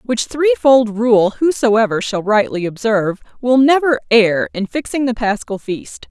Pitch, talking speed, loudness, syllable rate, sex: 230 Hz, 145 wpm, -15 LUFS, 4.4 syllables/s, female